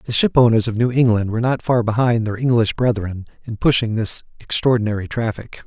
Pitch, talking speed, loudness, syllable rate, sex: 115 Hz, 190 wpm, -18 LUFS, 5.7 syllables/s, male